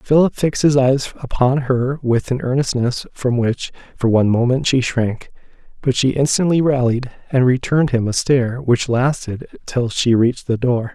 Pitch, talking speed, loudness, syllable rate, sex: 125 Hz, 175 wpm, -17 LUFS, 4.9 syllables/s, male